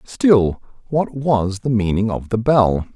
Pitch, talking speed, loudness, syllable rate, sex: 115 Hz, 165 wpm, -18 LUFS, 3.6 syllables/s, male